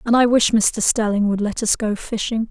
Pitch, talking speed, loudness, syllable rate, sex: 220 Hz, 240 wpm, -18 LUFS, 5.0 syllables/s, female